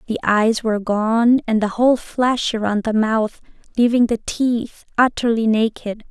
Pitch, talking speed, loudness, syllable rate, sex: 225 Hz, 155 wpm, -18 LUFS, 4.3 syllables/s, female